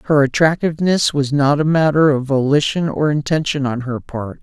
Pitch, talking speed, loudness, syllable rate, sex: 145 Hz, 175 wpm, -16 LUFS, 5.2 syllables/s, male